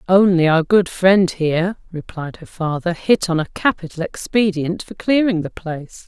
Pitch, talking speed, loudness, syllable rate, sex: 180 Hz, 170 wpm, -18 LUFS, 4.7 syllables/s, female